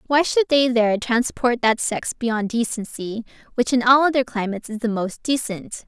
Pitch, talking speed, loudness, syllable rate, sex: 240 Hz, 185 wpm, -21 LUFS, 4.9 syllables/s, female